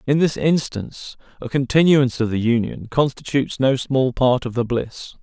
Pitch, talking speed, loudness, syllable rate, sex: 130 Hz, 170 wpm, -19 LUFS, 5.0 syllables/s, male